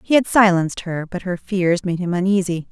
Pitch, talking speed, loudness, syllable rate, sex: 180 Hz, 220 wpm, -19 LUFS, 5.4 syllables/s, female